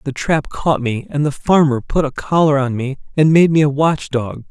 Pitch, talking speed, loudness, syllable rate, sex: 145 Hz, 225 wpm, -16 LUFS, 4.8 syllables/s, male